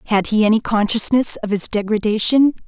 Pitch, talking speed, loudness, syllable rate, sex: 220 Hz, 155 wpm, -17 LUFS, 5.7 syllables/s, female